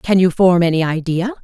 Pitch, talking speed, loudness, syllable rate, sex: 180 Hz, 210 wpm, -15 LUFS, 5.4 syllables/s, female